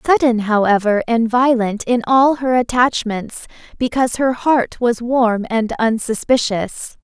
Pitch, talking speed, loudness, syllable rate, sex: 235 Hz, 130 wpm, -16 LUFS, 4.0 syllables/s, female